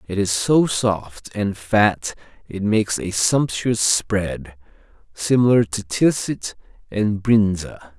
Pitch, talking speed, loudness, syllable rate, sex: 100 Hz, 120 wpm, -20 LUFS, 3.4 syllables/s, male